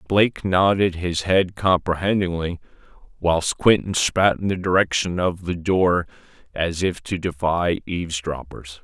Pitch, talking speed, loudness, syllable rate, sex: 90 Hz, 130 wpm, -21 LUFS, 4.3 syllables/s, male